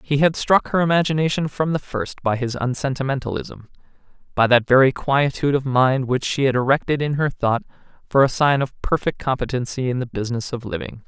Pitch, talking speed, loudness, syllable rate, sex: 135 Hz, 190 wpm, -20 LUFS, 5.7 syllables/s, male